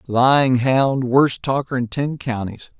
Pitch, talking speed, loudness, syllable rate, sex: 130 Hz, 130 wpm, -18 LUFS, 3.9 syllables/s, male